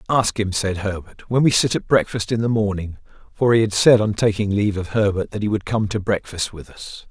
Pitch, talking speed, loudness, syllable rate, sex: 105 Hz, 245 wpm, -20 LUFS, 5.5 syllables/s, male